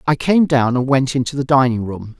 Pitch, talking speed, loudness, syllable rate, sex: 130 Hz, 245 wpm, -16 LUFS, 5.4 syllables/s, male